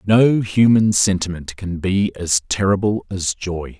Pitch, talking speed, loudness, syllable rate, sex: 95 Hz, 140 wpm, -18 LUFS, 3.9 syllables/s, male